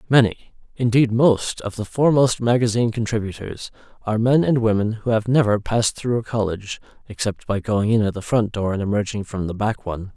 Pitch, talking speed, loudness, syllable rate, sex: 110 Hz, 195 wpm, -20 LUFS, 5.9 syllables/s, male